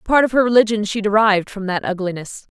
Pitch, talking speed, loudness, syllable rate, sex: 210 Hz, 235 wpm, -17 LUFS, 6.8 syllables/s, female